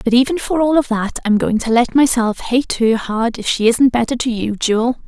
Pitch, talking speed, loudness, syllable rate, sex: 240 Hz, 250 wpm, -16 LUFS, 5.0 syllables/s, female